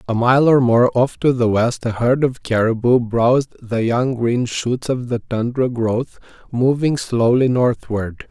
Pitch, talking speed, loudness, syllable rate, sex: 120 Hz, 175 wpm, -17 LUFS, 4.1 syllables/s, male